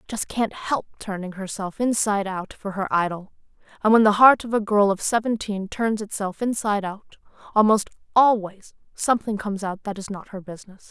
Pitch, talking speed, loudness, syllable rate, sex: 205 Hz, 180 wpm, -22 LUFS, 5.4 syllables/s, female